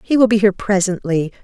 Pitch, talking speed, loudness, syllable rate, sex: 200 Hz, 210 wpm, -16 LUFS, 6.4 syllables/s, female